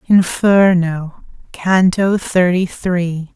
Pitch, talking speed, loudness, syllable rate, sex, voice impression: 180 Hz, 70 wpm, -15 LUFS, 2.8 syllables/s, female, feminine, adult-like, slightly dark, friendly, slightly reassuring